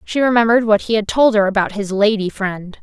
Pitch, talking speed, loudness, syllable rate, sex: 215 Hz, 235 wpm, -16 LUFS, 5.9 syllables/s, female